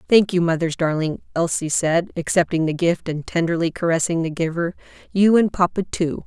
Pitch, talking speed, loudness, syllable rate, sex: 170 Hz, 170 wpm, -20 LUFS, 5.4 syllables/s, female